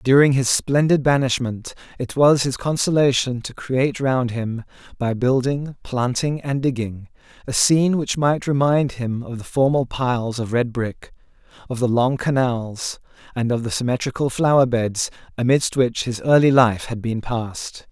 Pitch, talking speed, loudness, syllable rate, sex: 125 Hz, 160 wpm, -20 LUFS, 4.5 syllables/s, male